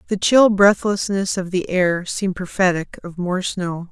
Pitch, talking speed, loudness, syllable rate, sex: 185 Hz, 170 wpm, -19 LUFS, 4.4 syllables/s, female